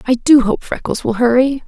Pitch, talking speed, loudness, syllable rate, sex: 245 Hz, 215 wpm, -14 LUFS, 5.2 syllables/s, female